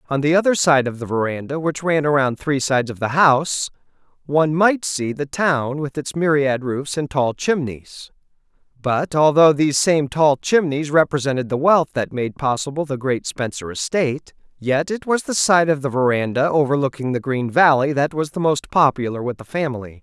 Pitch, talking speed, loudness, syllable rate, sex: 145 Hz, 190 wpm, -19 LUFS, 5.1 syllables/s, male